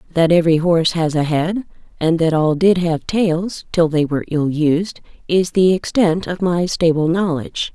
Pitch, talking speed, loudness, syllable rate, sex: 170 Hz, 185 wpm, -17 LUFS, 4.8 syllables/s, female